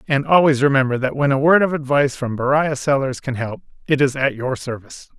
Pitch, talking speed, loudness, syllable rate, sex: 135 Hz, 220 wpm, -18 LUFS, 5.9 syllables/s, male